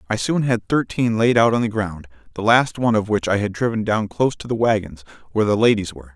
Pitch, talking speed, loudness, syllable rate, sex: 110 Hz, 255 wpm, -19 LUFS, 6.3 syllables/s, male